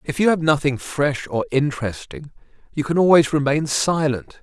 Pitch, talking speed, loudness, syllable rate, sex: 145 Hz, 165 wpm, -19 LUFS, 5.0 syllables/s, male